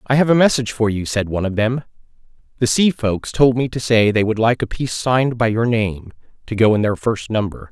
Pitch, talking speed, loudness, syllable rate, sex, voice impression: 115 Hz, 250 wpm, -18 LUFS, 5.7 syllables/s, male, masculine, adult-like, slightly thick, slightly refreshing, sincere, slightly unique